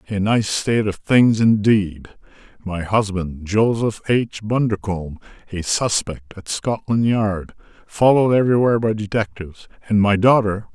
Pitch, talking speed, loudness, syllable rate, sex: 105 Hz, 130 wpm, -19 LUFS, 4.7 syllables/s, male